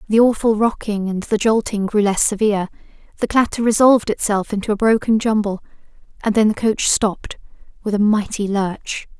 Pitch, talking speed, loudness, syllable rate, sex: 210 Hz, 170 wpm, -18 LUFS, 5.5 syllables/s, female